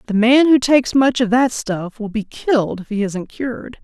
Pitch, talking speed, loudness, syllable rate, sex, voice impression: 235 Hz, 235 wpm, -17 LUFS, 5.0 syllables/s, female, very feminine, very adult-like, middle-aged, thin, tensed, slightly powerful, bright, very soft, very clear, fluent, slightly raspy, cute, very intellectual, very refreshing, sincere, very calm, very friendly, very reassuring, very elegant, sweet, slightly lively, kind, slightly intense, slightly modest, light